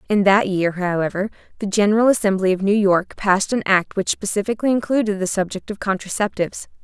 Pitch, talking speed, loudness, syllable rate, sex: 200 Hz, 175 wpm, -19 LUFS, 6.2 syllables/s, female